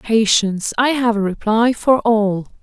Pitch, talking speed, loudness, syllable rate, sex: 220 Hz, 160 wpm, -16 LUFS, 4.1 syllables/s, female